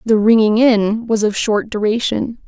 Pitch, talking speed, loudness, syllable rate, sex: 220 Hz, 170 wpm, -15 LUFS, 4.3 syllables/s, female